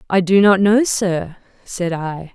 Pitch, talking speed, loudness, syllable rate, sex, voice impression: 185 Hz, 180 wpm, -16 LUFS, 3.7 syllables/s, female, very feminine, young, middle-aged, slightly thin, tensed, very powerful, bright, slightly soft, clear, muffled, fluent, raspy, cute, cool, intellectual, very refreshing, sincere, very calm, friendly, reassuring, unique, slightly elegant, wild, slightly sweet, lively, kind, slightly modest